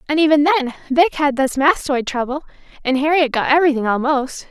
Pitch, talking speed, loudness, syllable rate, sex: 285 Hz, 175 wpm, -17 LUFS, 5.5 syllables/s, female